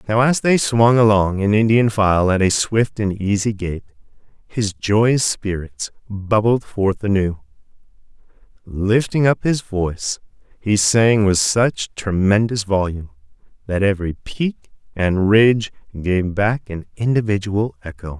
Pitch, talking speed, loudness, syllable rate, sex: 105 Hz, 130 wpm, -18 LUFS, 4.1 syllables/s, male